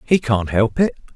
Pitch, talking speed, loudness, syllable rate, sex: 125 Hz, 205 wpm, -18 LUFS, 4.6 syllables/s, male